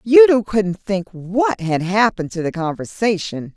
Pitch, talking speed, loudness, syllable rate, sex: 200 Hz, 150 wpm, -18 LUFS, 4.4 syllables/s, female